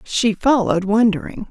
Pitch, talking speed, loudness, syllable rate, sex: 210 Hz, 120 wpm, -17 LUFS, 5.0 syllables/s, female